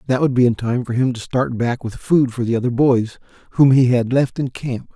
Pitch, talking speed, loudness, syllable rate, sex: 125 Hz, 265 wpm, -18 LUFS, 5.3 syllables/s, male